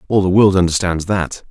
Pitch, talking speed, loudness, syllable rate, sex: 95 Hz, 200 wpm, -15 LUFS, 5.3 syllables/s, male